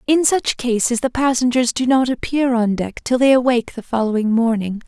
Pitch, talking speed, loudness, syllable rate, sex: 245 Hz, 195 wpm, -17 LUFS, 5.3 syllables/s, female